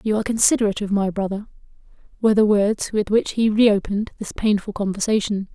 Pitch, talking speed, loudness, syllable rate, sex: 210 Hz, 175 wpm, -20 LUFS, 6.6 syllables/s, female